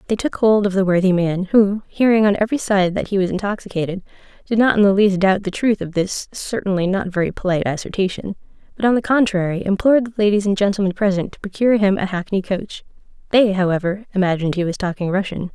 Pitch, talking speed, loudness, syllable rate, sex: 195 Hz, 210 wpm, -18 LUFS, 6.3 syllables/s, female